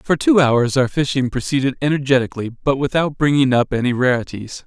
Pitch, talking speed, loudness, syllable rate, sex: 130 Hz, 165 wpm, -17 LUFS, 5.7 syllables/s, male